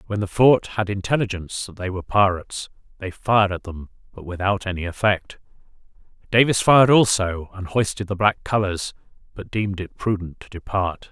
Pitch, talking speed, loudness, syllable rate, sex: 100 Hz, 165 wpm, -21 LUFS, 5.5 syllables/s, male